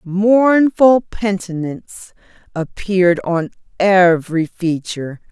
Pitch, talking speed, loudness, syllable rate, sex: 190 Hz, 70 wpm, -16 LUFS, 3.6 syllables/s, female